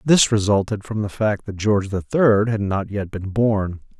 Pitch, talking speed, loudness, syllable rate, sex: 105 Hz, 210 wpm, -20 LUFS, 4.6 syllables/s, male